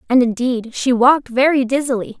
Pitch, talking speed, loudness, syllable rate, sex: 250 Hz, 165 wpm, -16 LUFS, 5.5 syllables/s, female